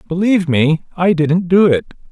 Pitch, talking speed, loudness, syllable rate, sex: 170 Hz, 170 wpm, -14 LUFS, 5.1 syllables/s, male